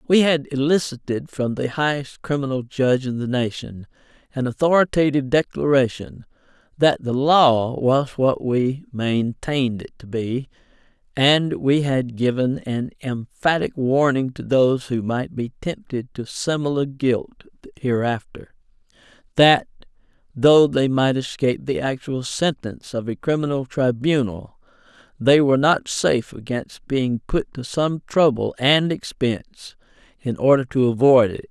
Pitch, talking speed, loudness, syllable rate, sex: 130 Hz, 135 wpm, -20 LUFS, 4.4 syllables/s, male